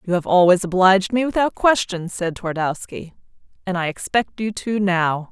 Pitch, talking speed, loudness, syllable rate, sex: 190 Hz, 170 wpm, -19 LUFS, 5.0 syllables/s, female